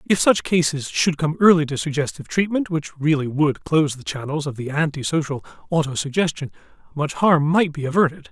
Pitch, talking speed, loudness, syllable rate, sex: 155 Hz, 175 wpm, -20 LUFS, 5.6 syllables/s, male